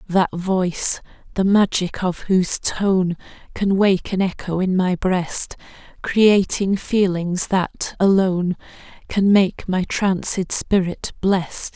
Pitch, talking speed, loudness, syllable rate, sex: 185 Hz, 125 wpm, -19 LUFS, 3.5 syllables/s, female